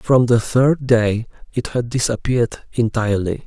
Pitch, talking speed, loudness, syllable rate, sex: 115 Hz, 140 wpm, -18 LUFS, 4.5 syllables/s, male